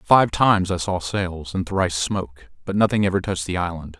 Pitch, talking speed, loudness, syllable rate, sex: 90 Hz, 210 wpm, -21 LUFS, 5.5 syllables/s, male